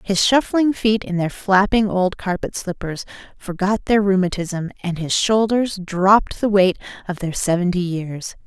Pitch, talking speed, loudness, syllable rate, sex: 195 Hz, 155 wpm, -19 LUFS, 4.4 syllables/s, female